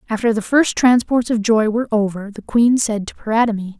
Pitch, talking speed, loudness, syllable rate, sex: 225 Hz, 205 wpm, -17 LUFS, 5.6 syllables/s, female